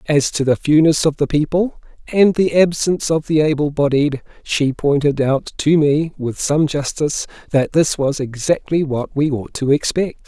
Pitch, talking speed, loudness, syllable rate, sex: 150 Hz, 180 wpm, -17 LUFS, 4.6 syllables/s, male